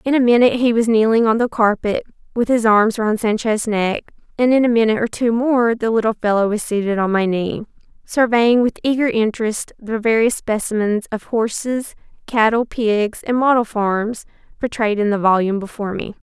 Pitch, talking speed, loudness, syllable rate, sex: 225 Hz, 185 wpm, -17 LUFS, 5.2 syllables/s, female